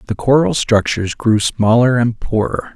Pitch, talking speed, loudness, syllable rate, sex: 115 Hz, 150 wpm, -15 LUFS, 4.7 syllables/s, male